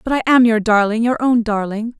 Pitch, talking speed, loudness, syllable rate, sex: 230 Hz, 240 wpm, -15 LUFS, 5.4 syllables/s, female